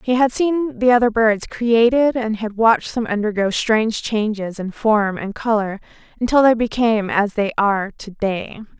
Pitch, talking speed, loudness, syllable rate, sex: 220 Hz, 175 wpm, -18 LUFS, 4.8 syllables/s, female